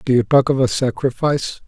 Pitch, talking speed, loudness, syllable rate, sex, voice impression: 130 Hz, 215 wpm, -17 LUFS, 5.8 syllables/s, male, very masculine, very adult-like, very old, very thick, slightly tensed, slightly weak, slightly dark, slightly soft, muffled, slightly fluent, slightly raspy, cool, intellectual, very sincere, calm, friendly, reassuring, unique, slightly elegant, wild, slightly sweet, kind, slightly modest